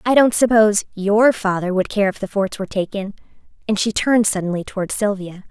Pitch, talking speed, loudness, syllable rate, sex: 205 Hz, 195 wpm, -18 LUFS, 5.9 syllables/s, female